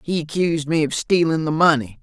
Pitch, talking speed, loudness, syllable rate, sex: 155 Hz, 210 wpm, -19 LUFS, 5.7 syllables/s, male